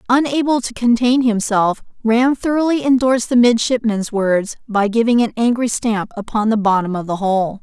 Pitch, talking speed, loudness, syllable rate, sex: 230 Hz, 165 wpm, -16 LUFS, 5.0 syllables/s, female